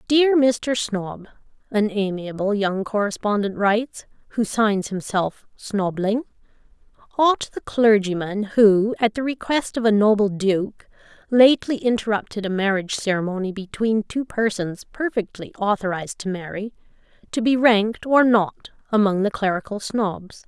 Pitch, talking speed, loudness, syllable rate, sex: 210 Hz, 130 wpm, -21 LUFS, 4.6 syllables/s, female